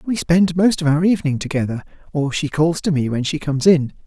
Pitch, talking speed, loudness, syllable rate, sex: 155 Hz, 235 wpm, -18 LUFS, 5.9 syllables/s, male